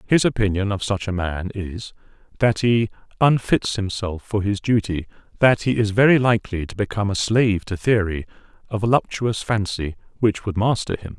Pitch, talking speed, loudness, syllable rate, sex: 105 Hz, 165 wpm, -21 LUFS, 5.2 syllables/s, male